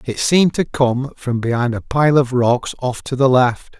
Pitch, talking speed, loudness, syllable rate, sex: 130 Hz, 220 wpm, -17 LUFS, 4.5 syllables/s, male